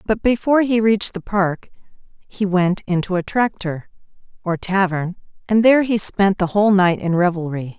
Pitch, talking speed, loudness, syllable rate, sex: 195 Hz, 170 wpm, -18 LUFS, 5.1 syllables/s, female